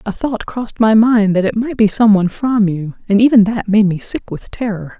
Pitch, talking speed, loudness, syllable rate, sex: 215 Hz, 250 wpm, -14 LUFS, 5.3 syllables/s, female